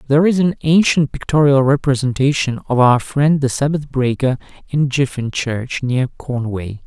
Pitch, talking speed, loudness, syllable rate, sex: 135 Hz, 150 wpm, -16 LUFS, 4.6 syllables/s, male